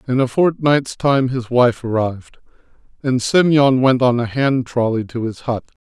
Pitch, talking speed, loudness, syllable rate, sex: 125 Hz, 175 wpm, -17 LUFS, 4.6 syllables/s, male